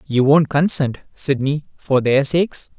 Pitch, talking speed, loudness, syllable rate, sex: 145 Hz, 150 wpm, -18 LUFS, 4.3 syllables/s, male